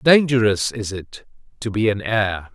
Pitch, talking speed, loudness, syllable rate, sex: 110 Hz, 165 wpm, -20 LUFS, 4.1 syllables/s, male